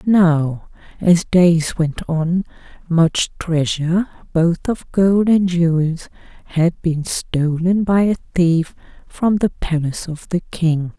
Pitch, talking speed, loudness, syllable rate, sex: 170 Hz, 130 wpm, -18 LUFS, 3.4 syllables/s, female